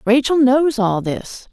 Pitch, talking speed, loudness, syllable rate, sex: 250 Hz, 160 wpm, -16 LUFS, 3.7 syllables/s, female